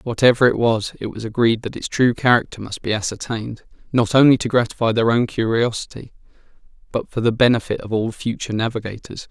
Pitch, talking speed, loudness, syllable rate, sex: 115 Hz, 180 wpm, -19 LUFS, 6.1 syllables/s, male